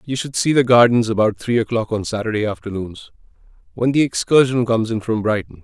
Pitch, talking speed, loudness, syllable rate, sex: 115 Hz, 190 wpm, -18 LUFS, 5.9 syllables/s, male